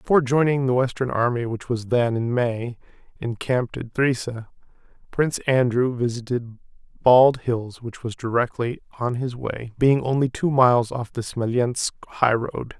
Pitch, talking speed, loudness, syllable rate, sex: 120 Hz, 150 wpm, -22 LUFS, 4.7 syllables/s, male